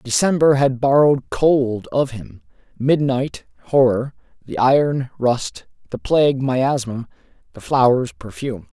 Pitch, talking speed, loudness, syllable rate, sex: 130 Hz, 115 wpm, -18 LUFS, 4.2 syllables/s, male